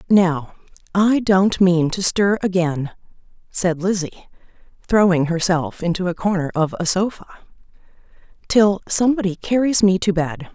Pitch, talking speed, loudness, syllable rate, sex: 185 Hz, 130 wpm, -18 LUFS, 4.5 syllables/s, female